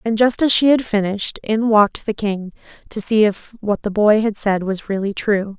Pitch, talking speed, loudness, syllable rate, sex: 210 Hz, 225 wpm, -18 LUFS, 4.9 syllables/s, female